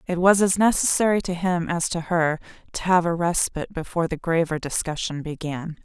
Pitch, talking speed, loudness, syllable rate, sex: 170 Hz, 185 wpm, -23 LUFS, 5.4 syllables/s, female